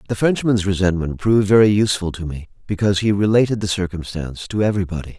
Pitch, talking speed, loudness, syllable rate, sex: 100 Hz, 175 wpm, -18 LUFS, 7.0 syllables/s, male